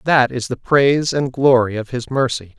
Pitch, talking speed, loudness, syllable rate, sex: 125 Hz, 210 wpm, -17 LUFS, 4.9 syllables/s, male